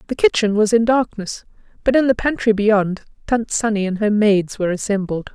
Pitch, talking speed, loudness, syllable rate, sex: 215 Hz, 190 wpm, -18 LUFS, 5.3 syllables/s, female